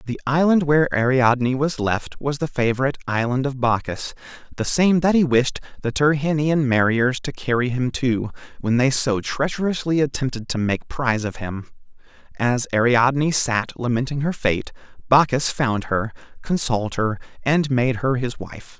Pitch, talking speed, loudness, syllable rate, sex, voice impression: 130 Hz, 160 wpm, -21 LUFS, 4.9 syllables/s, male, masculine, adult-like, tensed, powerful, bright, clear, fluent, cool, intellectual, friendly, wild, slightly lively, kind, modest